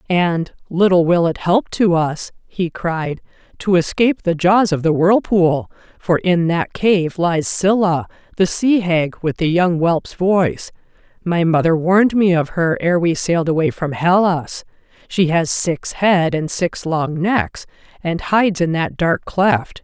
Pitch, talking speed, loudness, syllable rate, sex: 175 Hz, 170 wpm, -17 LUFS, 4.0 syllables/s, female